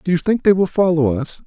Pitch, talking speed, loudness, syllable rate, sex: 170 Hz, 285 wpm, -17 LUFS, 5.9 syllables/s, male